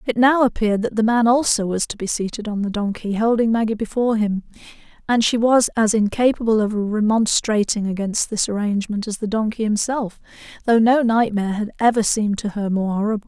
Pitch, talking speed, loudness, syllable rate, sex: 220 Hz, 190 wpm, -19 LUFS, 5.8 syllables/s, female